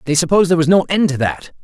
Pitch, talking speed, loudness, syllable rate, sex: 165 Hz, 295 wpm, -15 LUFS, 7.7 syllables/s, male